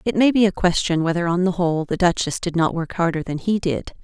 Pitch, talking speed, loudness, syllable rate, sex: 180 Hz, 270 wpm, -20 LUFS, 6.0 syllables/s, female